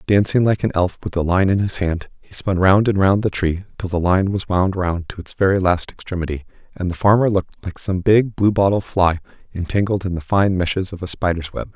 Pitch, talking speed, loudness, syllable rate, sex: 95 Hz, 235 wpm, -19 LUFS, 5.6 syllables/s, male